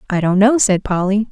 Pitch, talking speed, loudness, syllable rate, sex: 200 Hz, 230 wpm, -15 LUFS, 5.4 syllables/s, female